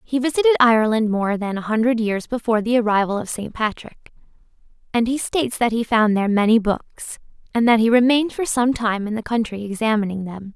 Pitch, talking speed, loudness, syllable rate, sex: 225 Hz, 200 wpm, -19 LUFS, 5.9 syllables/s, female